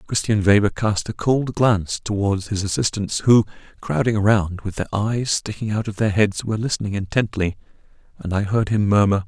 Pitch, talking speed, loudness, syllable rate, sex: 105 Hz, 180 wpm, -20 LUFS, 5.3 syllables/s, male